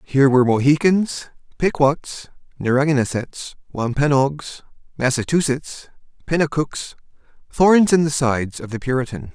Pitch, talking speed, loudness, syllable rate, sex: 140 Hz, 95 wpm, -19 LUFS, 4.6 syllables/s, male